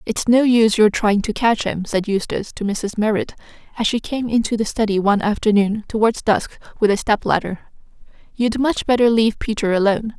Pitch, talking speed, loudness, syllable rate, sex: 220 Hz, 195 wpm, -18 LUFS, 5.6 syllables/s, female